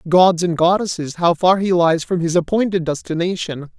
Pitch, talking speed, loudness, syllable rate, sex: 175 Hz, 175 wpm, -17 LUFS, 5.1 syllables/s, male